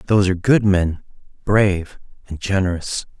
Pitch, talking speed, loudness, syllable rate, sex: 95 Hz, 130 wpm, -19 LUFS, 5.0 syllables/s, male